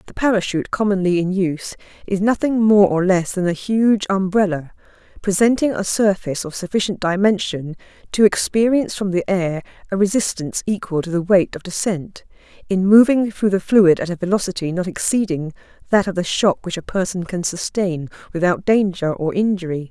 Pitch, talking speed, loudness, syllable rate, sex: 190 Hz, 170 wpm, -18 LUFS, 5.4 syllables/s, female